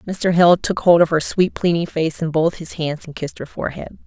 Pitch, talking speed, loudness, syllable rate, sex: 165 Hz, 250 wpm, -18 LUFS, 5.4 syllables/s, female